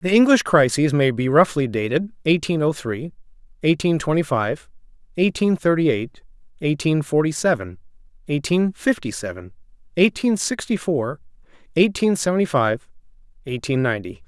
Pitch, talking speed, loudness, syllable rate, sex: 150 Hz, 125 wpm, -20 LUFS, 4.9 syllables/s, male